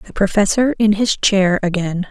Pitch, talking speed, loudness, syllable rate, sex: 200 Hz, 170 wpm, -16 LUFS, 4.4 syllables/s, female